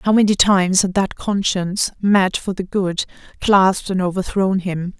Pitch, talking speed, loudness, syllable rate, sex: 190 Hz, 170 wpm, -18 LUFS, 4.7 syllables/s, female